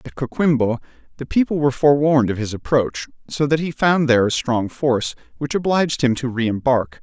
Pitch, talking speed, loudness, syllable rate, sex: 135 Hz, 195 wpm, -19 LUFS, 6.0 syllables/s, male